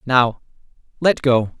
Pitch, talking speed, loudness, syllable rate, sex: 130 Hz, 115 wpm, -18 LUFS, 3.5 syllables/s, male